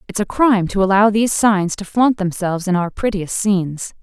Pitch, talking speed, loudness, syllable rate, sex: 200 Hz, 210 wpm, -17 LUFS, 5.5 syllables/s, female